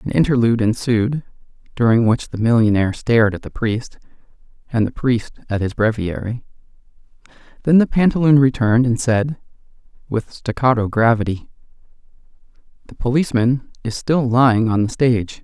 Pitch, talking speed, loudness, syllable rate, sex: 120 Hz, 130 wpm, -18 LUFS, 5.5 syllables/s, male